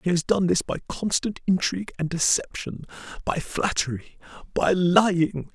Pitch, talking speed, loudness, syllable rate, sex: 180 Hz, 130 wpm, -24 LUFS, 5.0 syllables/s, male